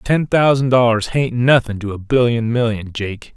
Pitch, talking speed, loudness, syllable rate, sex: 120 Hz, 180 wpm, -16 LUFS, 4.5 syllables/s, male